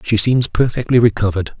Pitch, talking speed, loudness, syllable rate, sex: 115 Hz, 150 wpm, -15 LUFS, 6.1 syllables/s, male